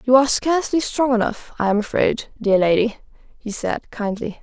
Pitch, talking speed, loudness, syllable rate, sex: 235 Hz, 175 wpm, -20 LUFS, 5.1 syllables/s, female